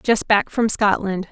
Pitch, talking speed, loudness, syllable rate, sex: 205 Hz, 180 wpm, -18 LUFS, 4.0 syllables/s, female